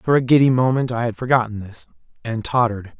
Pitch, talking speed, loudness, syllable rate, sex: 120 Hz, 200 wpm, -19 LUFS, 6.3 syllables/s, male